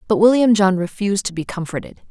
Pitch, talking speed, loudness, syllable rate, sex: 200 Hz, 200 wpm, -18 LUFS, 6.3 syllables/s, female